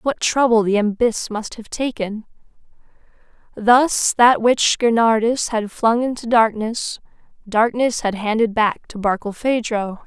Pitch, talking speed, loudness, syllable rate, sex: 225 Hz, 125 wpm, -18 LUFS, 4.0 syllables/s, female